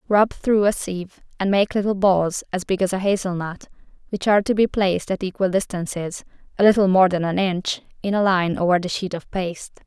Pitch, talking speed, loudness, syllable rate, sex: 190 Hz, 220 wpm, -21 LUFS, 5.2 syllables/s, female